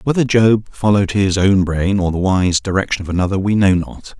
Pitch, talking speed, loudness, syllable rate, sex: 95 Hz, 215 wpm, -15 LUFS, 5.4 syllables/s, male